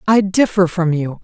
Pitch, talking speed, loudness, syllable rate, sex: 180 Hz, 195 wpm, -16 LUFS, 4.6 syllables/s, female